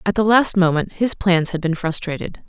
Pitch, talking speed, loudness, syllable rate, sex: 185 Hz, 220 wpm, -19 LUFS, 5.1 syllables/s, female